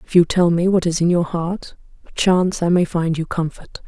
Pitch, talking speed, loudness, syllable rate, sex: 175 Hz, 230 wpm, -18 LUFS, 5.2 syllables/s, female